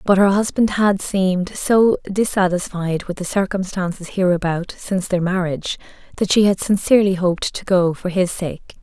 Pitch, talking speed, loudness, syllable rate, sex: 190 Hz, 165 wpm, -19 LUFS, 5.0 syllables/s, female